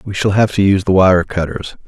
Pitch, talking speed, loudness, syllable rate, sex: 95 Hz, 255 wpm, -14 LUFS, 5.9 syllables/s, male